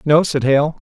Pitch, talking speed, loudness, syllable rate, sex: 145 Hz, 210 wpm, -16 LUFS, 4.3 syllables/s, male